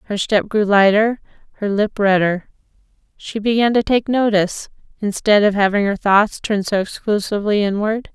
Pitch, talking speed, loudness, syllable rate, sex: 205 Hz, 155 wpm, -17 LUFS, 5.2 syllables/s, female